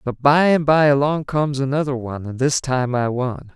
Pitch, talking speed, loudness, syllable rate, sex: 135 Hz, 220 wpm, -19 LUFS, 5.2 syllables/s, male